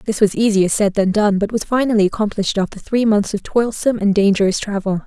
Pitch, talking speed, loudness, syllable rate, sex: 210 Hz, 215 wpm, -17 LUFS, 6.0 syllables/s, female